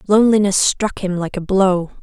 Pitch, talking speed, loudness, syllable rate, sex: 195 Hz, 180 wpm, -16 LUFS, 5.0 syllables/s, female